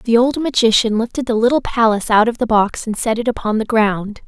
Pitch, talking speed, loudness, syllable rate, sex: 225 Hz, 240 wpm, -16 LUFS, 5.7 syllables/s, female